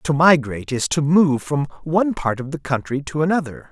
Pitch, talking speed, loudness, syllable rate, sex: 150 Hz, 210 wpm, -19 LUFS, 5.4 syllables/s, male